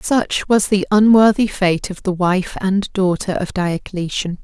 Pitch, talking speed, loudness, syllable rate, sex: 190 Hz, 160 wpm, -17 LUFS, 4.0 syllables/s, female